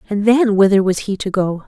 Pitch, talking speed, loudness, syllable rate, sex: 200 Hz, 250 wpm, -15 LUFS, 5.4 syllables/s, female